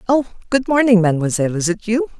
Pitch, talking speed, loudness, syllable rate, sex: 215 Hz, 190 wpm, -17 LUFS, 6.9 syllables/s, female